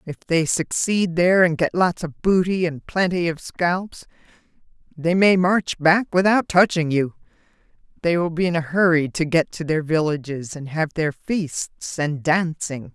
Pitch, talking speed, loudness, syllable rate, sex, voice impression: 170 Hz, 170 wpm, -20 LUFS, 4.4 syllables/s, female, feminine, adult-like, clear, slightly intellectual, slightly elegant